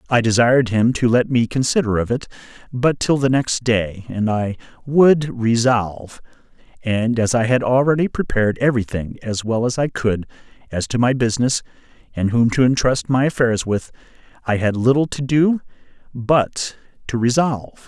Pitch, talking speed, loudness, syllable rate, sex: 120 Hz, 165 wpm, -18 LUFS, 5.0 syllables/s, male